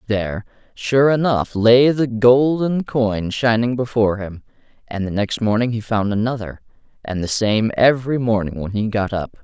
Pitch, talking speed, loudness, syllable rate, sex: 115 Hz, 165 wpm, -18 LUFS, 4.8 syllables/s, male